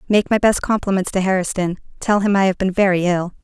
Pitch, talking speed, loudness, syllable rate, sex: 190 Hz, 225 wpm, -18 LUFS, 6.1 syllables/s, female